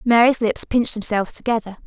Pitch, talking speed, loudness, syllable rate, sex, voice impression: 225 Hz, 160 wpm, -19 LUFS, 6.3 syllables/s, female, feminine, slightly young, tensed, fluent, slightly cute, slightly refreshing, friendly